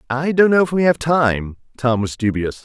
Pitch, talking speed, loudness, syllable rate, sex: 135 Hz, 225 wpm, -17 LUFS, 4.9 syllables/s, male